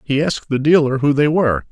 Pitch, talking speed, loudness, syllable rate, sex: 140 Hz, 245 wpm, -16 LUFS, 6.3 syllables/s, male